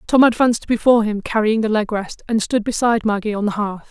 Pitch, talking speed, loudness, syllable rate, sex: 220 Hz, 230 wpm, -18 LUFS, 6.2 syllables/s, female